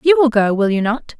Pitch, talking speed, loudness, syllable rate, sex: 245 Hz, 300 wpm, -15 LUFS, 5.5 syllables/s, female